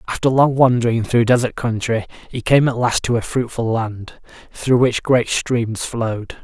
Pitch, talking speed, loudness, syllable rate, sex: 120 Hz, 175 wpm, -18 LUFS, 4.5 syllables/s, male